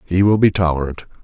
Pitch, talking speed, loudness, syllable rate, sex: 90 Hz, 195 wpm, -16 LUFS, 6.1 syllables/s, male